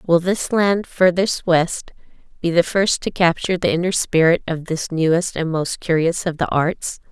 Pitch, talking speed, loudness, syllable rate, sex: 170 Hz, 185 wpm, -19 LUFS, 4.5 syllables/s, female